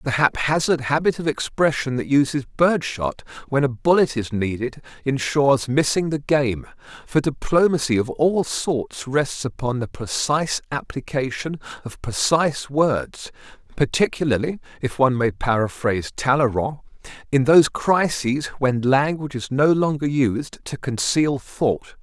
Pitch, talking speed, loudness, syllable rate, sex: 135 Hz, 130 wpm, -21 LUFS, 4.5 syllables/s, male